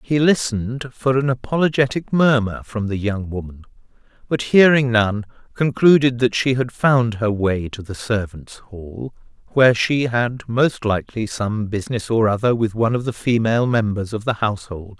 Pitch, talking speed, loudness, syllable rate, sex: 115 Hz, 170 wpm, -19 LUFS, 4.9 syllables/s, male